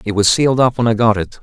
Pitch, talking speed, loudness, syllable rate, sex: 110 Hz, 335 wpm, -14 LUFS, 6.8 syllables/s, male